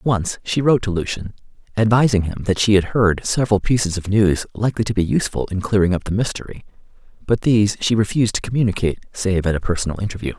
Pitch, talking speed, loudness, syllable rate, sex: 100 Hz, 200 wpm, -19 LUFS, 6.7 syllables/s, male